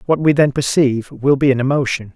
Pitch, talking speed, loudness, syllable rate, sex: 135 Hz, 225 wpm, -16 LUFS, 6.0 syllables/s, male